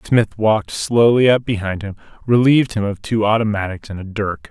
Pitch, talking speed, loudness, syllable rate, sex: 105 Hz, 185 wpm, -17 LUFS, 5.4 syllables/s, male